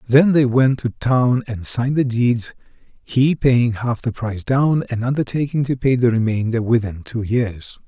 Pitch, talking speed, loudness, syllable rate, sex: 120 Hz, 185 wpm, -18 LUFS, 4.5 syllables/s, male